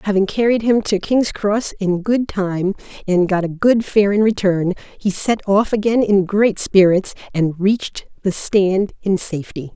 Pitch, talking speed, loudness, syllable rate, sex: 200 Hz, 180 wpm, -17 LUFS, 4.3 syllables/s, female